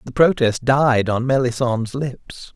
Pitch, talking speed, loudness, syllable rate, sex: 130 Hz, 140 wpm, -18 LUFS, 4.2 syllables/s, male